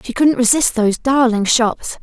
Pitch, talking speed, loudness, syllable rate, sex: 240 Hz, 180 wpm, -15 LUFS, 4.8 syllables/s, female